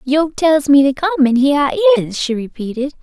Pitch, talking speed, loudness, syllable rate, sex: 285 Hz, 220 wpm, -14 LUFS, 5.7 syllables/s, female